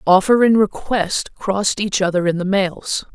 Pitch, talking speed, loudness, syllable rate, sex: 195 Hz, 170 wpm, -17 LUFS, 4.4 syllables/s, female